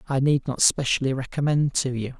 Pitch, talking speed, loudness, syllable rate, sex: 135 Hz, 190 wpm, -23 LUFS, 5.5 syllables/s, male